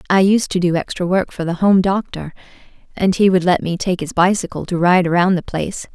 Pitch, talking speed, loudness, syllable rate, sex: 180 Hz, 230 wpm, -17 LUFS, 5.7 syllables/s, female